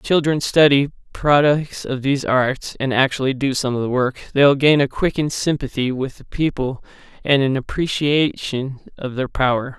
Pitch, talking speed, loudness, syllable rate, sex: 135 Hz, 180 wpm, -19 LUFS, 4.9 syllables/s, male